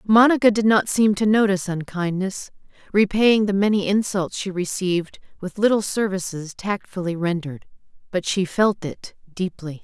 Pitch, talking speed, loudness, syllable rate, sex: 195 Hz, 140 wpm, -21 LUFS, 5.0 syllables/s, female